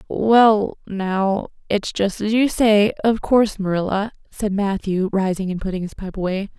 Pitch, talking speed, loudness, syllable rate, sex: 200 Hz, 165 wpm, -20 LUFS, 4.4 syllables/s, female